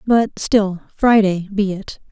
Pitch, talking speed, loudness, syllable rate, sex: 200 Hz, 140 wpm, -17 LUFS, 3.5 syllables/s, female